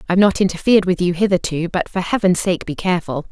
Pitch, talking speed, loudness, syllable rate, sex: 180 Hz, 215 wpm, -18 LUFS, 6.8 syllables/s, female